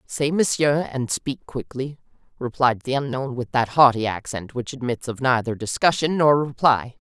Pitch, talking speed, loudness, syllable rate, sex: 130 Hz, 160 wpm, -22 LUFS, 4.6 syllables/s, female